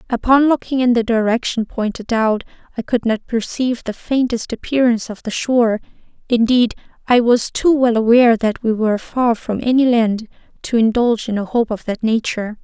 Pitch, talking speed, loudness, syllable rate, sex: 230 Hz, 175 wpm, -17 LUFS, 5.4 syllables/s, female